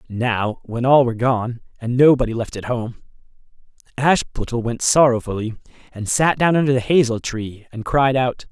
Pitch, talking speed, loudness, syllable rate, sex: 125 Hz, 160 wpm, -19 LUFS, 4.9 syllables/s, male